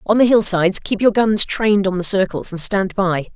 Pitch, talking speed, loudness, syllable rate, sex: 200 Hz, 235 wpm, -16 LUFS, 5.4 syllables/s, female